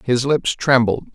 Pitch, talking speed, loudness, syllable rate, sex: 125 Hz, 155 wpm, -17 LUFS, 4.0 syllables/s, male